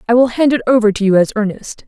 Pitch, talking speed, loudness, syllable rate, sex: 225 Hz, 290 wpm, -14 LUFS, 6.8 syllables/s, female